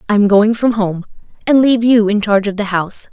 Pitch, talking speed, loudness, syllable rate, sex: 210 Hz, 250 wpm, -13 LUFS, 6.4 syllables/s, female